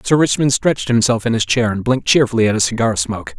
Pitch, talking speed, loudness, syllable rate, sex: 115 Hz, 250 wpm, -16 LUFS, 6.8 syllables/s, male